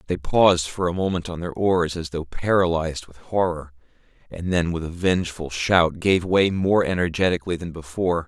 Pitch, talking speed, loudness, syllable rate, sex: 85 Hz, 180 wpm, -22 LUFS, 5.3 syllables/s, male